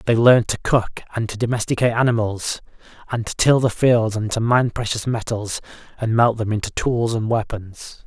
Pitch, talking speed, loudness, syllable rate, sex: 115 Hz, 185 wpm, -20 LUFS, 5.3 syllables/s, male